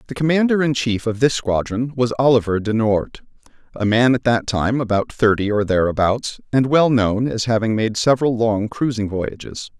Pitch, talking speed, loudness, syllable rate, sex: 115 Hz, 185 wpm, -18 LUFS, 5.0 syllables/s, male